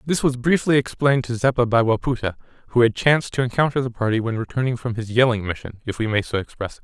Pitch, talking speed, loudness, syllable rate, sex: 120 Hz, 235 wpm, -21 LUFS, 6.7 syllables/s, male